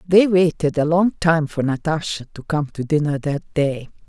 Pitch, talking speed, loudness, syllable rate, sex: 155 Hz, 190 wpm, -20 LUFS, 4.6 syllables/s, female